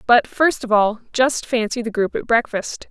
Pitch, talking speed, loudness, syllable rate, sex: 230 Hz, 205 wpm, -19 LUFS, 4.6 syllables/s, female